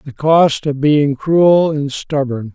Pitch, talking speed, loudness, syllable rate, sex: 145 Hz, 165 wpm, -14 LUFS, 3.3 syllables/s, male